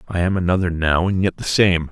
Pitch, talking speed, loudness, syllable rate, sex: 90 Hz, 250 wpm, -19 LUFS, 5.8 syllables/s, male